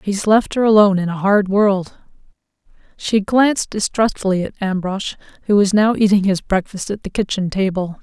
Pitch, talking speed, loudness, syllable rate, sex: 200 Hz, 170 wpm, -17 LUFS, 5.1 syllables/s, female